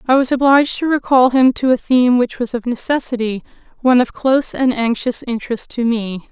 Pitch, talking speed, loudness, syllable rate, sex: 245 Hz, 200 wpm, -16 LUFS, 5.7 syllables/s, female